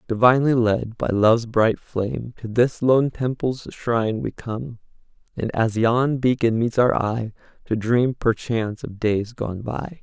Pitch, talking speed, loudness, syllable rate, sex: 115 Hz, 160 wpm, -21 LUFS, 4.2 syllables/s, male